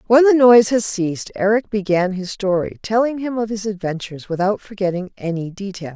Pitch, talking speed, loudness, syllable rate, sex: 200 Hz, 180 wpm, -19 LUFS, 5.7 syllables/s, female